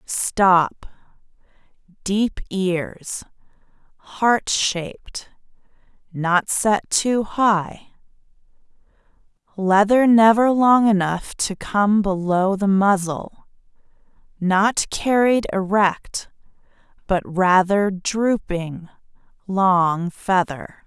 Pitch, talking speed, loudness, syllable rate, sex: 200 Hz, 70 wpm, -19 LUFS, 2.7 syllables/s, female